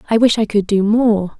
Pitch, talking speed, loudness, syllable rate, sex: 215 Hz, 260 wpm, -15 LUFS, 5.3 syllables/s, female